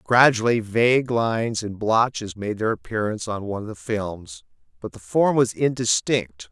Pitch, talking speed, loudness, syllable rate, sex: 115 Hz, 165 wpm, -22 LUFS, 4.8 syllables/s, male